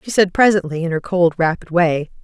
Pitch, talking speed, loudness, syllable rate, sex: 175 Hz, 215 wpm, -17 LUFS, 5.4 syllables/s, female